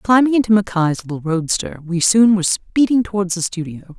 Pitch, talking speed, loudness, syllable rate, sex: 190 Hz, 180 wpm, -17 LUFS, 5.4 syllables/s, female